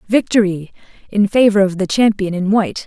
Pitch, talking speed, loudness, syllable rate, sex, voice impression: 200 Hz, 165 wpm, -15 LUFS, 5.5 syllables/s, female, feminine, adult-like, tensed, clear, fluent, intellectual, calm, elegant, slightly strict, slightly sharp